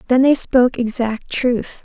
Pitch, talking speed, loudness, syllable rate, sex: 245 Hz, 165 wpm, -17 LUFS, 4.3 syllables/s, female